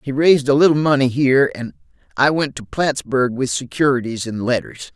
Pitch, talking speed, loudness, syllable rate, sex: 130 Hz, 180 wpm, -17 LUFS, 5.4 syllables/s, male